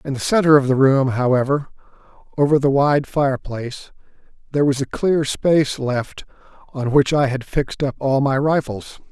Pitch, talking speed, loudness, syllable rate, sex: 140 Hz, 170 wpm, -18 LUFS, 5.2 syllables/s, male